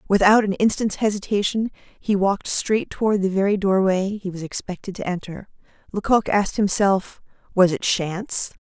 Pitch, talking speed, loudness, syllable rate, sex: 195 Hz, 145 wpm, -21 LUFS, 5.1 syllables/s, female